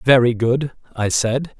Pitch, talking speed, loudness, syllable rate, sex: 125 Hz, 150 wpm, -19 LUFS, 3.9 syllables/s, male